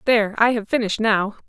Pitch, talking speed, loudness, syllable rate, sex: 220 Hz, 205 wpm, -19 LUFS, 6.5 syllables/s, female